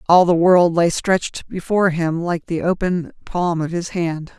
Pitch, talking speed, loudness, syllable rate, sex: 170 Hz, 190 wpm, -18 LUFS, 4.5 syllables/s, female